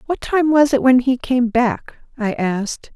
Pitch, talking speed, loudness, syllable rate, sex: 250 Hz, 205 wpm, -17 LUFS, 4.4 syllables/s, female